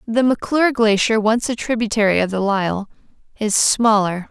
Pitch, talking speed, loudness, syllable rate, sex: 220 Hz, 155 wpm, -17 LUFS, 5.2 syllables/s, female